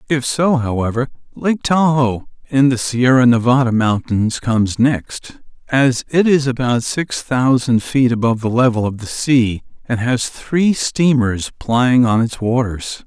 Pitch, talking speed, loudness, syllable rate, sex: 125 Hz, 150 wpm, -16 LUFS, 4.1 syllables/s, male